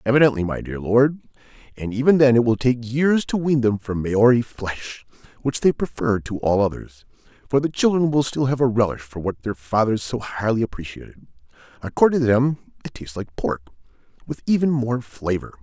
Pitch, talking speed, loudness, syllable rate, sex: 120 Hz, 190 wpm, -21 LUFS, 5.4 syllables/s, male